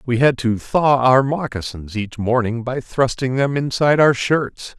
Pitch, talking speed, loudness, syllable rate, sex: 130 Hz, 175 wpm, -18 LUFS, 4.3 syllables/s, male